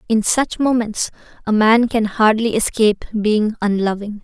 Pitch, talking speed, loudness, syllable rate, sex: 220 Hz, 140 wpm, -17 LUFS, 4.5 syllables/s, female